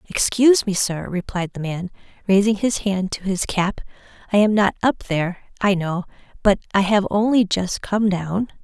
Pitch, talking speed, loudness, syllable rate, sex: 195 Hz, 180 wpm, -20 LUFS, 4.8 syllables/s, female